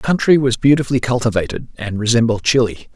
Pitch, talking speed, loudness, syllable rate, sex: 120 Hz, 165 wpm, -16 LUFS, 6.4 syllables/s, male